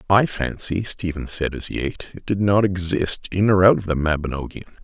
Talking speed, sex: 210 wpm, male